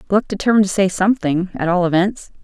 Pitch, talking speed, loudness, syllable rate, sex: 190 Hz, 195 wpm, -17 LUFS, 6.5 syllables/s, female